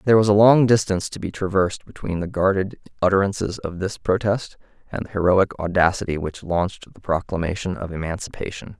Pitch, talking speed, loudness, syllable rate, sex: 95 Hz, 170 wpm, -21 LUFS, 6.0 syllables/s, male